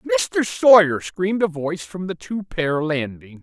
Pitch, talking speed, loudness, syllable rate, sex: 165 Hz, 175 wpm, -20 LUFS, 4.6 syllables/s, male